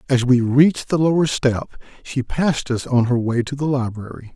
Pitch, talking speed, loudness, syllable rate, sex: 130 Hz, 205 wpm, -19 LUFS, 5.2 syllables/s, male